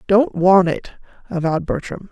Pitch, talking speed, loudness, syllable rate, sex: 185 Hz, 140 wpm, -18 LUFS, 5.2 syllables/s, female